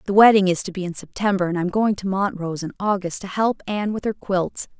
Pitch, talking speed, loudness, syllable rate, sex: 195 Hz, 250 wpm, -21 LUFS, 6.1 syllables/s, female